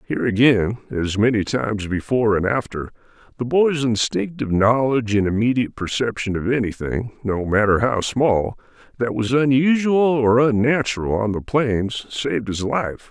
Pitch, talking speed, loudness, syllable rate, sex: 115 Hz, 145 wpm, -20 LUFS, 5.0 syllables/s, male